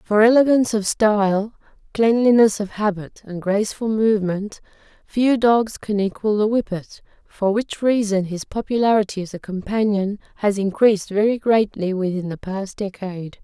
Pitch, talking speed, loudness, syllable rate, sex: 210 Hz, 145 wpm, -20 LUFS, 5.0 syllables/s, female